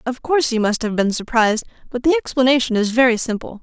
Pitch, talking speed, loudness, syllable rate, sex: 240 Hz, 215 wpm, -18 LUFS, 6.5 syllables/s, female